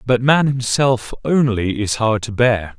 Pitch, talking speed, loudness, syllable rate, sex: 120 Hz, 170 wpm, -17 LUFS, 3.9 syllables/s, male